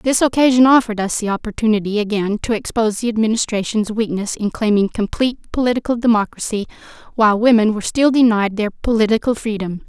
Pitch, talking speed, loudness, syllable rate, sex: 220 Hz, 150 wpm, -17 LUFS, 6.3 syllables/s, female